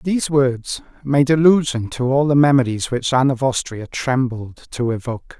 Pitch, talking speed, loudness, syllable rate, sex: 130 Hz, 165 wpm, -18 LUFS, 4.9 syllables/s, male